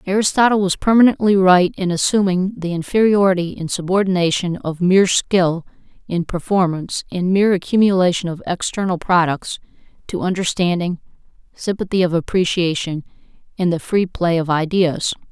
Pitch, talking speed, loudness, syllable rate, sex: 180 Hz, 125 wpm, -17 LUFS, 5.3 syllables/s, female